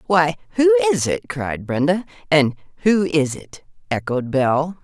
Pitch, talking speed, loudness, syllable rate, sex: 170 Hz, 150 wpm, -19 LUFS, 4.5 syllables/s, female